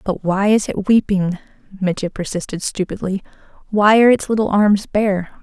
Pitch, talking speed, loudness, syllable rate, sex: 200 Hz, 155 wpm, -17 LUFS, 5.1 syllables/s, female